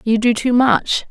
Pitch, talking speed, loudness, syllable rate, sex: 235 Hz, 220 wpm, -15 LUFS, 4.0 syllables/s, female